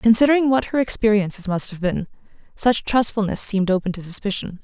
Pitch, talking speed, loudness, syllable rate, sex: 210 Hz, 170 wpm, -20 LUFS, 6.1 syllables/s, female